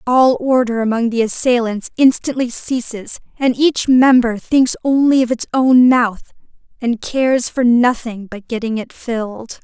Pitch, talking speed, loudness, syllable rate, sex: 245 Hz, 150 wpm, -15 LUFS, 4.4 syllables/s, female